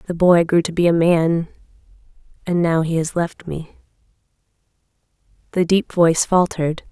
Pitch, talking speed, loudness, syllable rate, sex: 170 Hz, 145 wpm, -18 LUFS, 4.9 syllables/s, female